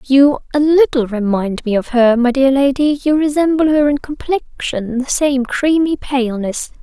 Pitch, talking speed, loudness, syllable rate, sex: 270 Hz, 160 wpm, -15 LUFS, 4.5 syllables/s, female